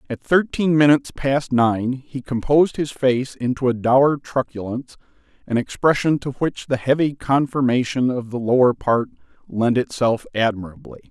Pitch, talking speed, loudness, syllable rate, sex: 130 Hz, 145 wpm, -20 LUFS, 4.8 syllables/s, male